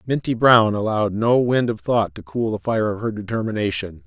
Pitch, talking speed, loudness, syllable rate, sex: 115 Hz, 205 wpm, -20 LUFS, 5.3 syllables/s, male